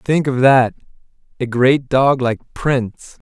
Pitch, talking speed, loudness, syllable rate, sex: 130 Hz, 125 wpm, -16 LUFS, 3.4 syllables/s, male